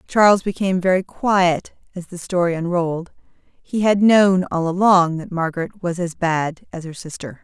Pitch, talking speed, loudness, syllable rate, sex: 180 Hz, 170 wpm, -18 LUFS, 4.8 syllables/s, female